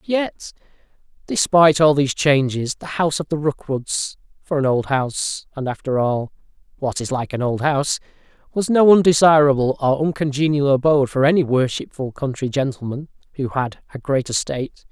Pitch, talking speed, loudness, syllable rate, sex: 140 Hz, 150 wpm, -19 LUFS, 5.3 syllables/s, male